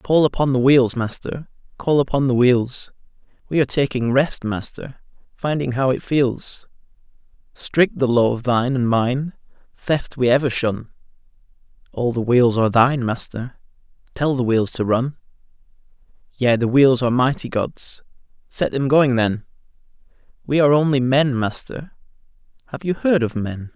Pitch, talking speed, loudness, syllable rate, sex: 130 Hz, 145 wpm, -19 LUFS, 4.7 syllables/s, male